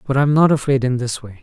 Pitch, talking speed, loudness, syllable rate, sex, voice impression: 130 Hz, 295 wpm, -17 LUFS, 6.3 syllables/s, male, very masculine, adult-like, slightly relaxed, weak, dark, soft, slightly muffled, slightly halting, slightly cool, intellectual, slightly refreshing, very sincere, calm, slightly mature, friendly, slightly reassuring, slightly unique, slightly elegant, slightly wild, sweet, slightly lively, very kind, very modest, light